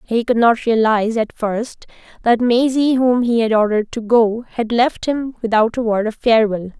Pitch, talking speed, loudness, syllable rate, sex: 230 Hz, 195 wpm, -16 LUFS, 4.9 syllables/s, female